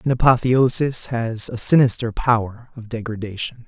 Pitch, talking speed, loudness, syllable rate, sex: 120 Hz, 130 wpm, -19 LUFS, 4.9 syllables/s, male